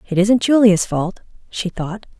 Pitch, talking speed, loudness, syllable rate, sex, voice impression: 200 Hz, 165 wpm, -17 LUFS, 4.2 syllables/s, female, very feminine, slightly adult-like, very thin, slightly tensed, slightly weak, very bright, soft, very clear, very fluent, very cute, intellectual, very refreshing, sincere, calm, very friendly, very reassuring, very unique, very elegant, very sweet, lively, kind, sharp, light